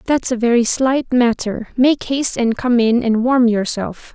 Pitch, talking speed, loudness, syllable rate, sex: 240 Hz, 190 wpm, -16 LUFS, 4.3 syllables/s, female